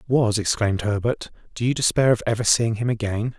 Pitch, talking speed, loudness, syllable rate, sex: 115 Hz, 195 wpm, -22 LUFS, 5.8 syllables/s, male